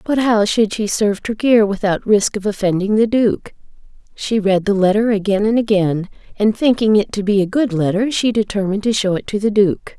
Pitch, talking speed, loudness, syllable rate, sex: 205 Hz, 210 wpm, -16 LUFS, 5.3 syllables/s, female